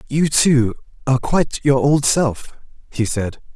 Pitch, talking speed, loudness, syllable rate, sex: 135 Hz, 150 wpm, -18 LUFS, 4.2 syllables/s, male